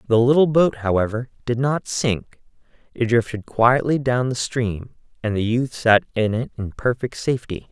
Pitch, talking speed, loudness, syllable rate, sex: 120 Hz, 170 wpm, -21 LUFS, 4.7 syllables/s, male